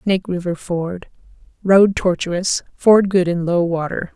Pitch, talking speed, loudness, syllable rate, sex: 180 Hz, 130 wpm, -17 LUFS, 4.7 syllables/s, female